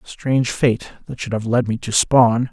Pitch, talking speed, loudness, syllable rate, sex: 120 Hz, 215 wpm, -18 LUFS, 4.4 syllables/s, male